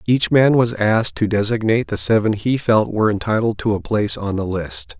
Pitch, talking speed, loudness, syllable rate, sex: 110 Hz, 215 wpm, -18 LUFS, 5.6 syllables/s, male